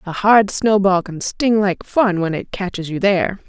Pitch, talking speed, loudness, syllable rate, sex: 195 Hz, 205 wpm, -17 LUFS, 4.5 syllables/s, female